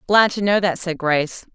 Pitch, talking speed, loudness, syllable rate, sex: 180 Hz, 230 wpm, -19 LUFS, 5.2 syllables/s, female